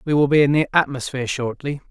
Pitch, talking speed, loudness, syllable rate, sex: 140 Hz, 220 wpm, -19 LUFS, 6.6 syllables/s, male